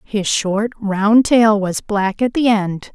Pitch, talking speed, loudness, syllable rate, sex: 210 Hz, 185 wpm, -16 LUFS, 3.2 syllables/s, female